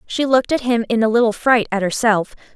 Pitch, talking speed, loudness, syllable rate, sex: 230 Hz, 235 wpm, -17 LUFS, 6.0 syllables/s, female